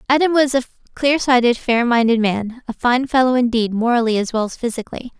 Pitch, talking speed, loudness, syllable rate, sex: 240 Hz, 185 wpm, -17 LUFS, 5.8 syllables/s, female